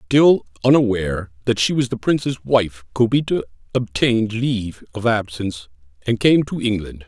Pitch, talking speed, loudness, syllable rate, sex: 110 Hz, 145 wpm, -19 LUFS, 5.1 syllables/s, male